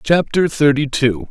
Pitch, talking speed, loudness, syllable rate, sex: 145 Hz, 140 wpm, -16 LUFS, 4.1 syllables/s, male